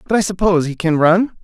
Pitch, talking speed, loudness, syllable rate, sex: 180 Hz, 250 wpm, -15 LUFS, 6.6 syllables/s, male